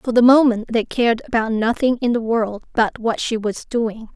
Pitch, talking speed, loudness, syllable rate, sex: 230 Hz, 215 wpm, -19 LUFS, 4.9 syllables/s, female